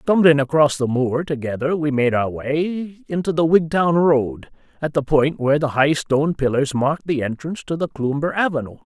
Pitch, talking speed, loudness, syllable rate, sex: 150 Hz, 190 wpm, -19 LUFS, 5.1 syllables/s, male